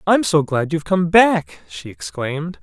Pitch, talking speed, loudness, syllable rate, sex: 160 Hz, 185 wpm, -17 LUFS, 4.5 syllables/s, male